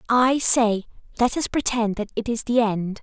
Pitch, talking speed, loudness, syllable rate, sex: 230 Hz, 200 wpm, -21 LUFS, 4.6 syllables/s, female